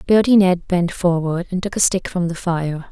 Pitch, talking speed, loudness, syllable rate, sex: 180 Hz, 225 wpm, -18 LUFS, 4.8 syllables/s, female